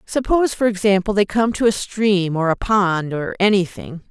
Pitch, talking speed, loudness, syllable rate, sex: 200 Hz, 190 wpm, -18 LUFS, 4.9 syllables/s, female